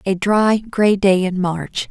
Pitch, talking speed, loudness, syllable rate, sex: 195 Hz, 190 wpm, -17 LUFS, 3.5 syllables/s, female